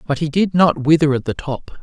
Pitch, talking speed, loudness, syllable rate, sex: 155 Hz, 265 wpm, -17 LUFS, 5.4 syllables/s, male